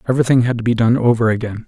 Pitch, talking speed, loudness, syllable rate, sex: 120 Hz, 250 wpm, -16 LUFS, 8.2 syllables/s, male